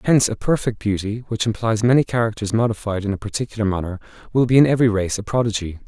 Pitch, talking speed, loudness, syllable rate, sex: 110 Hz, 205 wpm, -20 LUFS, 7.0 syllables/s, male